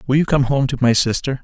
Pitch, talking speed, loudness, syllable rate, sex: 130 Hz, 295 wpm, -17 LUFS, 6.4 syllables/s, male